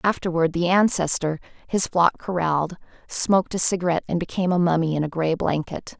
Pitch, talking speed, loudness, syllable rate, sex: 175 Hz, 170 wpm, -22 LUFS, 5.9 syllables/s, female